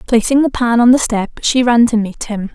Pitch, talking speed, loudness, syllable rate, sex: 235 Hz, 260 wpm, -13 LUFS, 5.3 syllables/s, female